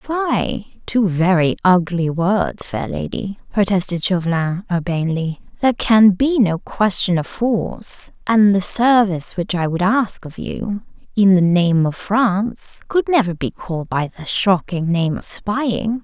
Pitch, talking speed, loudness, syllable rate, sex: 195 Hz, 155 wpm, -18 LUFS, 4.3 syllables/s, female